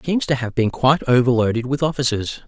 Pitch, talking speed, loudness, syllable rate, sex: 130 Hz, 220 wpm, -19 LUFS, 6.6 syllables/s, male